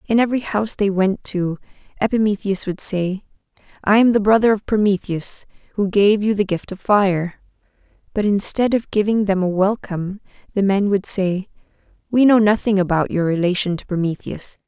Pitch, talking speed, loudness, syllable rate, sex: 200 Hz, 170 wpm, -19 LUFS, 5.2 syllables/s, female